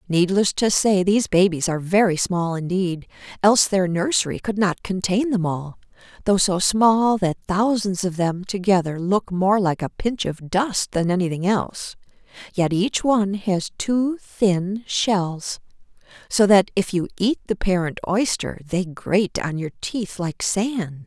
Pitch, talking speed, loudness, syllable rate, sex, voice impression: 190 Hz, 160 wpm, -21 LUFS, 4.3 syllables/s, female, very feminine, slightly middle-aged, slightly thin, slightly tensed, powerful, slightly bright, hard, clear, very fluent, slightly raspy, cool, intellectual, refreshing, sincere, slightly calm, friendly, very reassuring, unique, slightly elegant, slightly wild, sweet, slightly lively, strict, slightly intense, slightly sharp